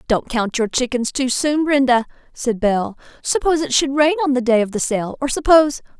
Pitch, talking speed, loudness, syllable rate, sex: 255 Hz, 210 wpm, -18 LUFS, 5.5 syllables/s, female